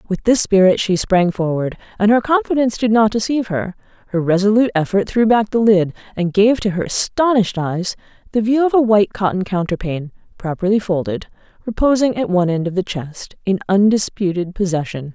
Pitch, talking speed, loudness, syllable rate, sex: 200 Hz, 180 wpm, -17 LUFS, 5.8 syllables/s, female